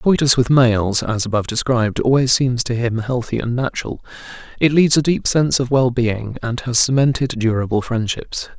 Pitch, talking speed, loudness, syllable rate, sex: 125 Hz, 175 wpm, -17 LUFS, 5.3 syllables/s, male